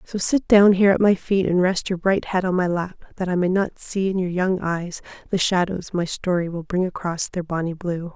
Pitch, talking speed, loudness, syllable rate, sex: 180 Hz, 250 wpm, -21 LUFS, 5.2 syllables/s, female